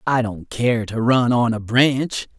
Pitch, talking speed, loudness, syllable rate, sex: 120 Hz, 200 wpm, -19 LUFS, 3.7 syllables/s, male